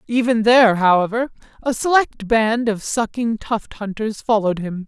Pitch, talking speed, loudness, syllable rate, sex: 220 Hz, 150 wpm, -18 LUFS, 4.8 syllables/s, male